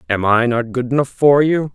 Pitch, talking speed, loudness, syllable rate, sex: 125 Hz, 240 wpm, -15 LUFS, 5.1 syllables/s, male